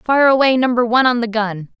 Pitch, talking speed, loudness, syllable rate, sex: 240 Hz, 235 wpm, -15 LUFS, 5.8 syllables/s, female